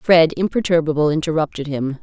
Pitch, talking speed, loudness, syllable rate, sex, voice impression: 160 Hz, 120 wpm, -18 LUFS, 5.5 syllables/s, female, feminine, adult-like, tensed, powerful, clear, fluent, nasal, intellectual, calm, unique, elegant, lively, slightly sharp